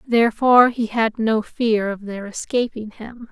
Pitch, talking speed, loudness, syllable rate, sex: 225 Hz, 165 wpm, -19 LUFS, 4.4 syllables/s, female